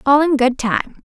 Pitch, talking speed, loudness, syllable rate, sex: 275 Hz, 225 wpm, -16 LUFS, 4.7 syllables/s, female